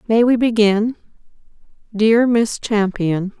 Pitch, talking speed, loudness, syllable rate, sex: 220 Hz, 105 wpm, -16 LUFS, 3.6 syllables/s, female